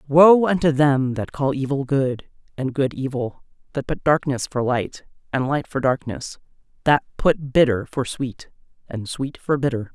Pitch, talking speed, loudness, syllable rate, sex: 135 Hz, 170 wpm, -21 LUFS, 4.4 syllables/s, female